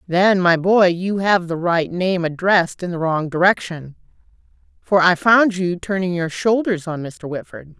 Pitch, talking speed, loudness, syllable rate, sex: 180 Hz, 175 wpm, -18 LUFS, 4.4 syllables/s, female